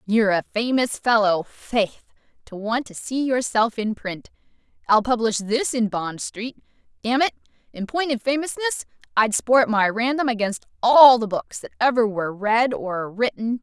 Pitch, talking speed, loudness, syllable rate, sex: 230 Hz, 170 wpm, -21 LUFS, 4.9 syllables/s, female